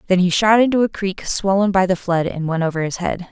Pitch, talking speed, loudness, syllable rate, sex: 185 Hz, 270 wpm, -18 LUFS, 5.8 syllables/s, female